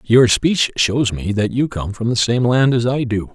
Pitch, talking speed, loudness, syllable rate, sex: 120 Hz, 250 wpm, -17 LUFS, 4.5 syllables/s, male